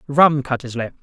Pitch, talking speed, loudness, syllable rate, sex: 135 Hz, 235 wpm, -18 LUFS, 5.1 syllables/s, male